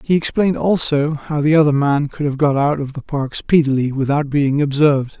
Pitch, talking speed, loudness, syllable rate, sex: 145 Hz, 210 wpm, -17 LUFS, 5.3 syllables/s, male